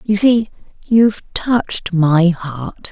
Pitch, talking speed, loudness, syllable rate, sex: 195 Hz, 125 wpm, -15 LUFS, 3.2 syllables/s, female